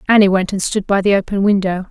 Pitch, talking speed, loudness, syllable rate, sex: 195 Hz, 250 wpm, -15 LUFS, 6.4 syllables/s, female